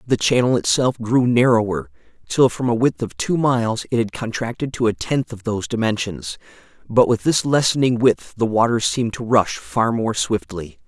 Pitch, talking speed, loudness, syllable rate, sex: 115 Hz, 190 wpm, -19 LUFS, 5.0 syllables/s, male